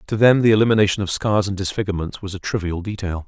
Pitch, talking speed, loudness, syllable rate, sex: 100 Hz, 220 wpm, -19 LUFS, 7.0 syllables/s, male